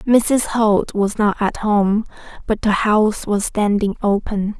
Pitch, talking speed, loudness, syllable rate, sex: 210 Hz, 155 wpm, -18 LUFS, 3.7 syllables/s, female